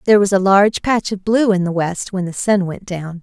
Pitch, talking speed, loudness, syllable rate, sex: 195 Hz, 280 wpm, -16 LUFS, 5.5 syllables/s, female